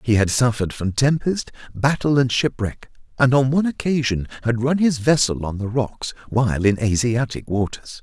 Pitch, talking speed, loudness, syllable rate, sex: 125 Hz, 170 wpm, -20 LUFS, 5.1 syllables/s, male